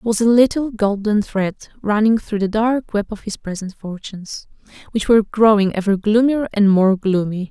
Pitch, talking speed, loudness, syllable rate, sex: 210 Hz, 185 wpm, -17 LUFS, 5.1 syllables/s, female